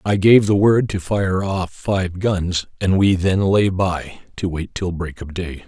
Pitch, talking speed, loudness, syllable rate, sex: 95 Hz, 210 wpm, -19 LUFS, 3.8 syllables/s, male